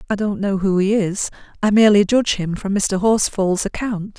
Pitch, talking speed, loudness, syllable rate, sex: 200 Hz, 200 wpm, -18 LUFS, 5.2 syllables/s, female